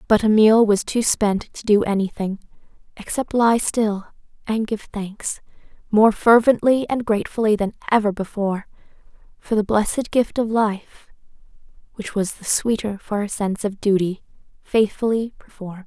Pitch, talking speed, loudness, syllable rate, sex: 210 Hz, 145 wpm, -20 LUFS, 4.8 syllables/s, female